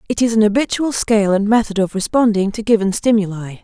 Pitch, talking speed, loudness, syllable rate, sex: 215 Hz, 200 wpm, -16 LUFS, 6.1 syllables/s, female